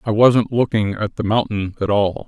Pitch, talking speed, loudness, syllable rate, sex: 105 Hz, 210 wpm, -18 LUFS, 4.9 syllables/s, male